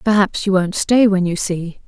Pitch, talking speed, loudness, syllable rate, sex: 195 Hz, 225 wpm, -17 LUFS, 4.6 syllables/s, female